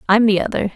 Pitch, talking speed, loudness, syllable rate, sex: 205 Hz, 235 wpm, -17 LUFS, 7.0 syllables/s, female